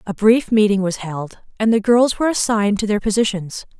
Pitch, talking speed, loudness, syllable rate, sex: 210 Hz, 205 wpm, -17 LUFS, 5.5 syllables/s, female